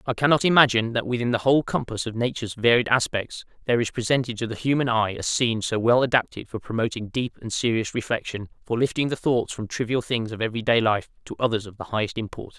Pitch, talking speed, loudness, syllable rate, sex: 115 Hz, 225 wpm, -23 LUFS, 6.5 syllables/s, male